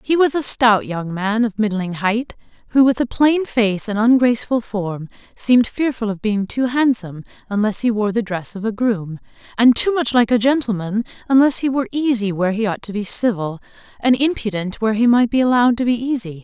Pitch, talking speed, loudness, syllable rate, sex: 225 Hz, 210 wpm, -18 LUFS, 5.5 syllables/s, female